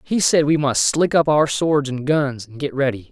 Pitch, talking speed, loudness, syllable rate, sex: 145 Hz, 250 wpm, -18 LUFS, 4.7 syllables/s, male